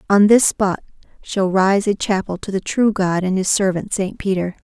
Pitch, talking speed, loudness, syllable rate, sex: 195 Hz, 205 wpm, -18 LUFS, 4.7 syllables/s, female